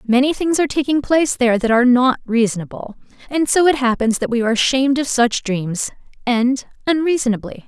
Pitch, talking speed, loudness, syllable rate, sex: 255 Hz, 180 wpm, -17 LUFS, 6.0 syllables/s, female